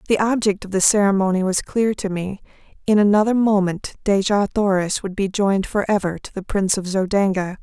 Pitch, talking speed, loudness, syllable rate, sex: 200 Hz, 180 wpm, -19 LUFS, 5.6 syllables/s, female